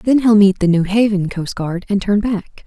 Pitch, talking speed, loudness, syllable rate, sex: 200 Hz, 205 wpm, -16 LUFS, 4.6 syllables/s, female